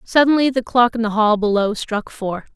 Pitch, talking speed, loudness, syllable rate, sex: 230 Hz, 210 wpm, -18 LUFS, 5.0 syllables/s, female